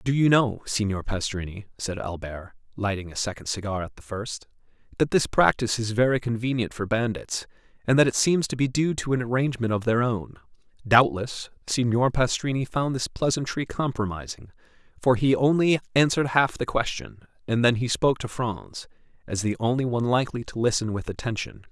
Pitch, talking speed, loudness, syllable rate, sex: 115 Hz, 175 wpm, -25 LUFS, 5.5 syllables/s, male